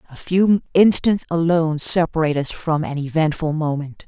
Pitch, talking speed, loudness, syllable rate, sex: 160 Hz, 145 wpm, -19 LUFS, 5.2 syllables/s, female